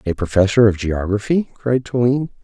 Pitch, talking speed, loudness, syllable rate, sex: 110 Hz, 150 wpm, -17 LUFS, 5.5 syllables/s, male